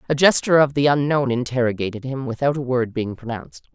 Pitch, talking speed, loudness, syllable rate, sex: 130 Hz, 190 wpm, -20 LUFS, 6.3 syllables/s, female